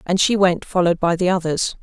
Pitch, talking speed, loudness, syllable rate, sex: 180 Hz, 230 wpm, -18 LUFS, 6.0 syllables/s, female